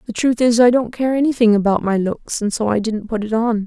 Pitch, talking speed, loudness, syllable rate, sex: 225 Hz, 280 wpm, -17 LUFS, 5.7 syllables/s, female